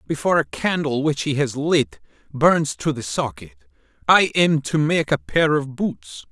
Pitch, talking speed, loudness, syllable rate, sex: 135 Hz, 180 wpm, -20 LUFS, 4.3 syllables/s, male